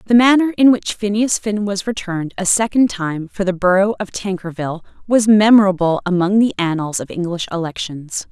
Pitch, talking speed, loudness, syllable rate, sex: 195 Hz, 175 wpm, -17 LUFS, 5.3 syllables/s, female